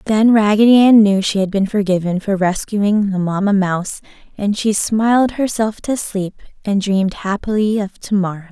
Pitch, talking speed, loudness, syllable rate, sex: 205 Hz, 170 wpm, -16 LUFS, 4.9 syllables/s, female